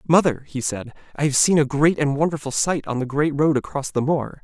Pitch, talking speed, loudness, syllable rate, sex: 145 Hz, 245 wpm, -21 LUFS, 5.5 syllables/s, male